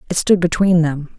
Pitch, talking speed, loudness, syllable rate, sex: 170 Hz, 205 wpm, -16 LUFS, 5.1 syllables/s, female